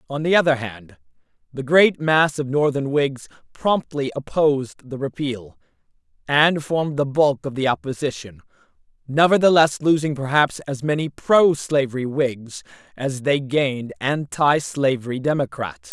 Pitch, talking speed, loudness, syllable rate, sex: 140 Hz, 130 wpm, -20 LUFS, 4.5 syllables/s, male